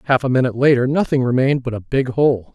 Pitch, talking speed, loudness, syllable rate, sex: 130 Hz, 235 wpm, -17 LUFS, 6.8 syllables/s, male